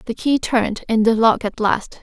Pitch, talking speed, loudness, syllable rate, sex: 225 Hz, 235 wpm, -18 LUFS, 4.9 syllables/s, female